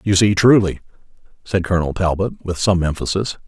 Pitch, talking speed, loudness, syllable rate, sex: 90 Hz, 155 wpm, -18 LUFS, 5.9 syllables/s, male